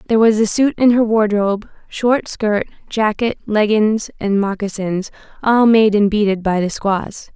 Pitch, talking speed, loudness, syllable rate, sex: 210 Hz, 165 wpm, -16 LUFS, 4.5 syllables/s, female